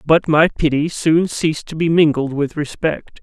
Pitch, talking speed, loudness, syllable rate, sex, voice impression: 155 Hz, 185 wpm, -17 LUFS, 4.6 syllables/s, male, masculine, middle-aged, relaxed, slightly weak, soft, raspy, intellectual, calm, slightly mature, slightly friendly, reassuring, slightly wild, lively, strict